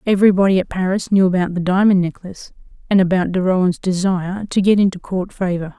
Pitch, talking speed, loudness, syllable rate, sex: 185 Hz, 185 wpm, -17 LUFS, 6.3 syllables/s, female